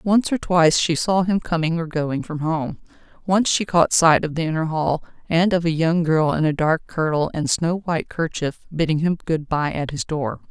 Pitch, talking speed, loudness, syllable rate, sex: 165 Hz, 225 wpm, -20 LUFS, 4.9 syllables/s, female